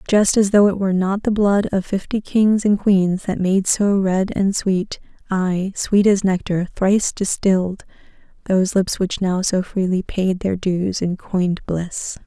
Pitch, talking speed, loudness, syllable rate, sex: 190 Hz, 180 wpm, -19 LUFS, 4.2 syllables/s, female